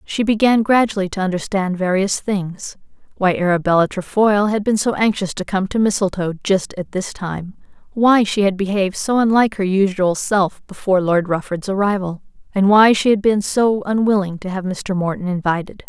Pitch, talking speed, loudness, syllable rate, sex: 195 Hz, 175 wpm, -18 LUFS, 5.2 syllables/s, female